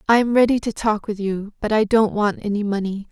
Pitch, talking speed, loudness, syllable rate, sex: 210 Hz, 250 wpm, -20 LUFS, 5.6 syllables/s, female